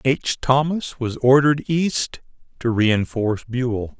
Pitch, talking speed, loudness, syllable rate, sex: 130 Hz, 120 wpm, -20 LUFS, 3.8 syllables/s, male